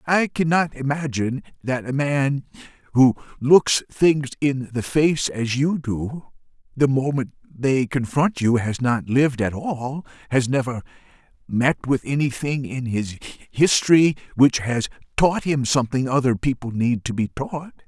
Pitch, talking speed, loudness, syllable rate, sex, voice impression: 135 Hz, 150 wpm, -21 LUFS, 4.1 syllables/s, male, very masculine, very middle-aged, very thick, very tensed, very powerful, very bright, very soft, very clear, very fluent, raspy, cool, slightly intellectual, very refreshing, slightly sincere, slightly calm, mature, very friendly, very reassuring, very unique, very wild, sweet, very lively, slightly kind, intense, slightly sharp, light